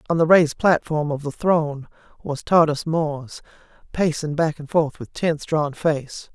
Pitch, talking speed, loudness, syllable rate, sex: 155 Hz, 170 wpm, -21 LUFS, 4.5 syllables/s, female